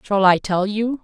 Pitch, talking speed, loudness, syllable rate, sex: 205 Hz, 230 wpm, -18 LUFS, 4.3 syllables/s, female